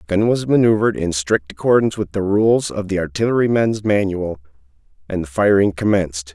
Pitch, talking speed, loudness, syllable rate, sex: 100 Hz, 170 wpm, -18 LUFS, 5.8 syllables/s, male